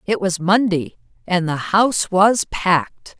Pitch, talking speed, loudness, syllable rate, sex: 190 Hz, 150 wpm, -18 LUFS, 4.0 syllables/s, female